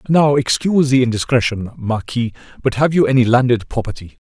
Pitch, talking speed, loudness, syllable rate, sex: 125 Hz, 155 wpm, -16 LUFS, 5.7 syllables/s, male